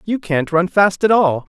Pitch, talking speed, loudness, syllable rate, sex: 185 Hz, 235 wpm, -16 LUFS, 4.3 syllables/s, male